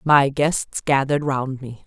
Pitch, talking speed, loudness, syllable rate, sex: 140 Hz, 160 wpm, -20 LUFS, 4.0 syllables/s, female